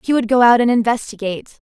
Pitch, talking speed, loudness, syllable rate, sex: 230 Hz, 215 wpm, -15 LUFS, 6.7 syllables/s, female